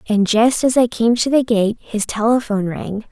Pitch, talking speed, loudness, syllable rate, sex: 225 Hz, 210 wpm, -17 LUFS, 4.9 syllables/s, female